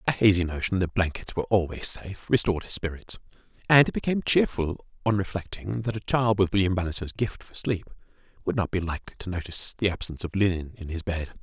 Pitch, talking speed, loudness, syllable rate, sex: 95 Hz, 205 wpm, -26 LUFS, 6.4 syllables/s, male